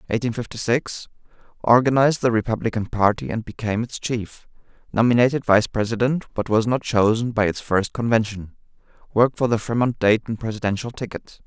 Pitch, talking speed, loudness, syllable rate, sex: 115 Hz, 145 wpm, -21 LUFS, 5.8 syllables/s, male